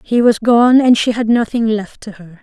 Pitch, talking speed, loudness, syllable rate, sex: 225 Hz, 245 wpm, -13 LUFS, 4.7 syllables/s, female